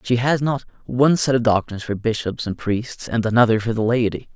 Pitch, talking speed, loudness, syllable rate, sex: 115 Hz, 220 wpm, -20 LUFS, 5.7 syllables/s, male